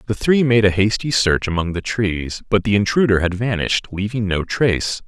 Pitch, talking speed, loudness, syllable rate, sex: 105 Hz, 200 wpm, -18 LUFS, 5.2 syllables/s, male